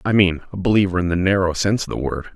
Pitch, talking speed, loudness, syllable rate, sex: 95 Hz, 280 wpm, -19 LUFS, 7.3 syllables/s, male